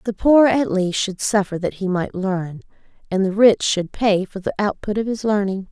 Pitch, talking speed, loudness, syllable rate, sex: 200 Hz, 220 wpm, -19 LUFS, 4.8 syllables/s, female